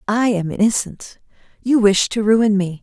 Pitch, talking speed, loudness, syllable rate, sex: 210 Hz, 170 wpm, -17 LUFS, 4.4 syllables/s, female